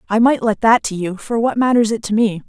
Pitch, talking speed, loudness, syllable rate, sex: 220 Hz, 290 wpm, -16 LUFS, 5.7 syllables/s, female